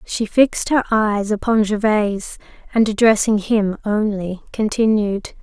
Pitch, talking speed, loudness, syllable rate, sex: 210 Hz, 120 wpm, -18 LUFS, 4.3 syllables/s, female